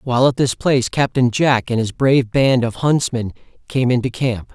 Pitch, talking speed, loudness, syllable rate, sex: 125 Hz, 235 wpm, -17 LUFS, 5.1 syllables/s, male